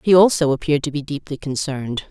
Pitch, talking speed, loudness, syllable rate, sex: 150 Hz, 200 wpm, -20 LUFS, 6.5 syllables/s, female